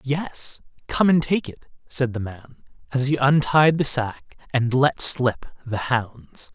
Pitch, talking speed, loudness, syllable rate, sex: 130 Hz, 165 wpm, -21 LUFS, 3.5 syllables/s, male